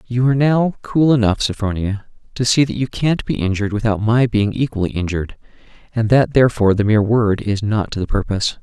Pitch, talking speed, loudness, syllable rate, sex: 115 Hz, 200 wpm, -17 LUFS, 6.1 syllables/s, male